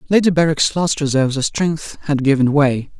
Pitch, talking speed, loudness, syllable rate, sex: 150 Hz, 180 wpm, -17 LUFS, 5.3 syllables/s, male